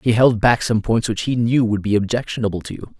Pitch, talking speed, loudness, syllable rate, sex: 115 Hz, 260 wpm, -18 LUFS, 5.8 syllables/s, male